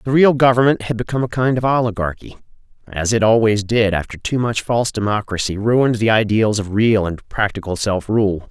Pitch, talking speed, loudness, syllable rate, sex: 110 Hz, 190 wpm, -17 LUFS, 5.6 syllables/s, male